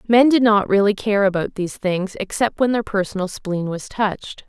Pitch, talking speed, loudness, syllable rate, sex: 205 Hz, 200 wpm, -19 LUFS, 5.1 syllables/s, female